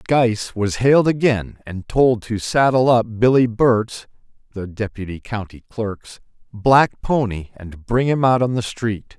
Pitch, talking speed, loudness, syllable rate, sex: 115 Hz, 155 wpm, -18 LUFS, 3.9 syllables/s, male